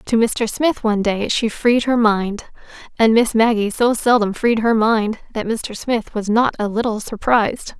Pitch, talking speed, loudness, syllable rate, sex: 220 Hz, 185 wpm, -18 LUFS, 4.4 syllables/s, female